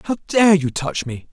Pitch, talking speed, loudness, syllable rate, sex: 165 Hz, 225 wpm, -18 LUFS, 4.4 syllables/s, male